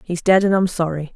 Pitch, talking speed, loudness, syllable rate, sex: 175 Hz, 260 wpm, -18 LUFS, 5.7 syllables/s, female